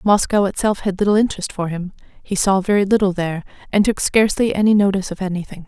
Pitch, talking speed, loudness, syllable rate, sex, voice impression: 195 Hz, 200 wpm, -18 LUFS, 6.8 syllables/s, female, very feminine, slightly young, very adult-like, very thin, slightly relaxed, slightly weak, bright, slightly hard, very clear, fluent, slightly raspy, very cute, slightly cool, very intellectual, very refreshing, very sincere, very calm, very friendly, very reassuring, unique, very elegant, very sweet, slightly lively, very kind, modest, light